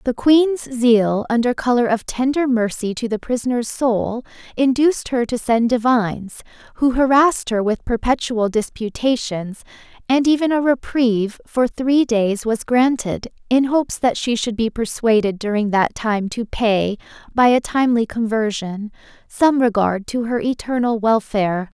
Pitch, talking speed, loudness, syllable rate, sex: 235 Hz, 150 wpm, -18 LUFS, 4.6 syllables/s, female